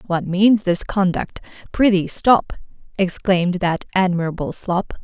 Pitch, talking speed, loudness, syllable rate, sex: 185 Hz, 120 wpm, -19 LUFS, 4.2 syllables/s, female